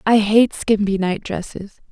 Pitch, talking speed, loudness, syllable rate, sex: 205 Hz, 155 wpm, -18 LUFS, 4.2 syllables/s, female